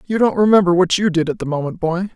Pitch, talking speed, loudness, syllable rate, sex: 180 Hz, 280 wpm, -16 LUFS, 6.4 syllables/s, female